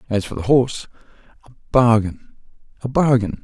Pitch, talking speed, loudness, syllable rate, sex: 115 Hz, 120 wpm, -18 LUFS, 5.6 syllables/s, male